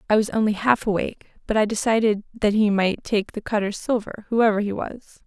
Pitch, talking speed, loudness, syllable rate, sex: 215 Hz, 205 wpm, -22 LUFS, 5.7 syllables/s, female